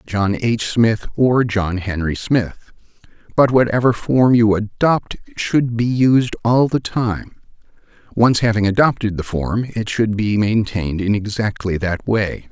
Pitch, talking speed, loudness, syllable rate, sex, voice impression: 110 Hz, 150 wpm, -17 LUFS, 4.0 syllables/s, male, masculine, adult-like, thick, tensed, soft, clear, fluent, cool, intellectual, calm, mature, reassuring, wild, lively, kind